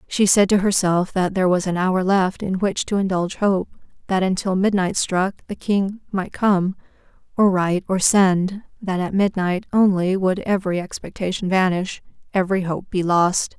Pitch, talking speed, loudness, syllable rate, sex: 190 Hz, 170 wpm, -20 LUFS, 4.8 syllables/s, female